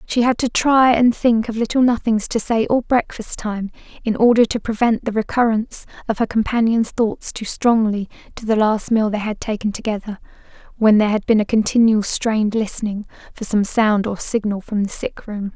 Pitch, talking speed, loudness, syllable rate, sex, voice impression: 220 Hz, 195 wpm, -18 LUFS, 5.2 syllables/s, female, feminine, slightly young, slightly relaxed, bright, soft, slightly raspy, cute, slightly refreshing, calm, friendly, reassuring, elegant, slightly sweet, kind